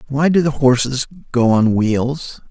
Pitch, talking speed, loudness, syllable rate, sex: 135 Hz, 170 wpm, -16 LUFS, 4.0 syllables/s, male